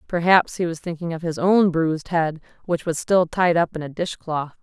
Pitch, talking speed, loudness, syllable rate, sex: 170 Hz, 220 wpm, -21 LUFS, 5.0 syllables/s, female